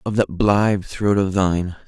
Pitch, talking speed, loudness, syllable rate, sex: 95 Hz, 190 wpm, -19 LUFS, 4.7 syllables/s, male